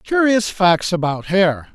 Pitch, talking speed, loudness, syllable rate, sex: 190 Hz, 140 wpm, -17 LUFS, 3.7 syllables/s, male